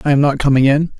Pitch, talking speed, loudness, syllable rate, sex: 140 Hz, 305 wpm, -14 LUFS, 7.1 syllables/s, male